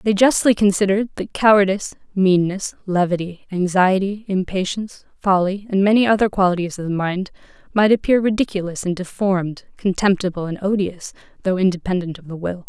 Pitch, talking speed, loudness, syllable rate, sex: 190 Hz, 140 wpm, -19 LUFS, 5.7 syllables/s, female